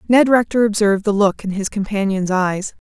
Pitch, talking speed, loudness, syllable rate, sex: 205 Hz, 190 wpm, -17 LUFS, 5.4 syllables/s, female